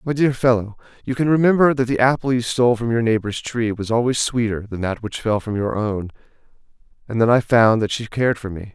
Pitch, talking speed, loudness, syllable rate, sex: 115 Hz, 235 wpm, -19 LUFS, 5.8 syllables/s, male